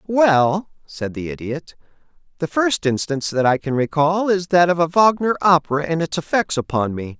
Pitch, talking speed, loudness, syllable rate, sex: 160 Hz, 185 wpm, -19 LUFS, 5.0 syllables/s, male